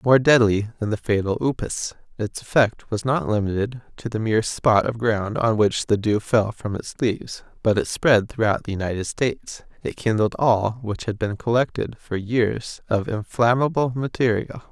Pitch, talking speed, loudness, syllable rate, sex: 110 Hz, 180 wpm, -22 LUFS, 4.7 syllables/s, male